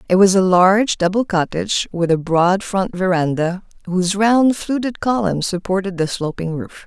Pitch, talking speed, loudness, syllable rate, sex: 190 Hz, 165 wpm, -17 LUFS, 4.8 syllables/s, female